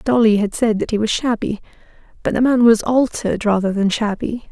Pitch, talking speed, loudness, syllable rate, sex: 220 Hz, 185 wpm, -17 LUFS, 5.6 syllables/s, female